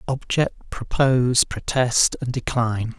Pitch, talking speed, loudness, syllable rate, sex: 125 Hz, 100 wpm, -21 LUFS, 4.2 syllables/s, male